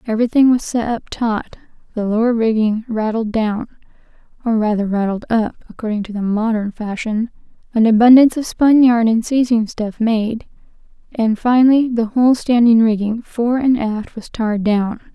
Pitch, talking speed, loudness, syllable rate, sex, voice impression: 225 Hz, 160 wpm, -16 LUFS, 4.5 syllables/s, female, feminine, adult-like, slightly relaxed, slightly weak, soft, slightly muffled, slightly cute, calm, friendly, reassuring, kind